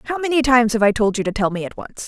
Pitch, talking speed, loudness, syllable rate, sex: 235 Hz, 345 wpm, -18 LUFS, 7.4 syllables/s, female